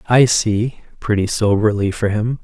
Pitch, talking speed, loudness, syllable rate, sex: 110 Hz, 150 wpm, -17 LUFS, 4.4 syllables/s, male